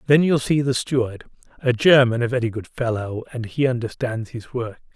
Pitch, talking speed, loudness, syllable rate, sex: 125 Hz, 180 wpm, -21 LUFS, 5.2 syllables/s, male